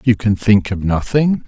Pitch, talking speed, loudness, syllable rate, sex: 110 Hz, 205 wpm, -16 LUFS, 4.4 syllables/s, male